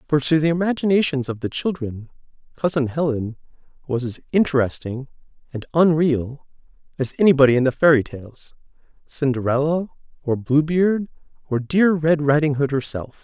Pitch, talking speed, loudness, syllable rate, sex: 145 Hz, 135 wpm, -20 LUFS, 5.1 syllables/s, male